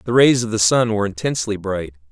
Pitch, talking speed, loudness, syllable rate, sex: 105 Hz, 225 wpm, -18 LUFS, 6.6 syllables/s, male